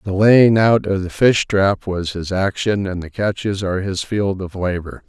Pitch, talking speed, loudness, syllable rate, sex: 95 Hz, 215 wpm, -18 LUFS, 4.4 syllables/s, male